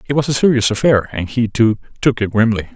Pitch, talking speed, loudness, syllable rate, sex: 115 Hz, 240 wpm, -16 LUFS, 6.0 syllables/s, male